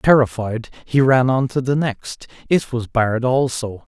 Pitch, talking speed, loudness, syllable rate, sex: 125 Hz, 165 wpm, -19 LUFS, 4.3 syllables/s, male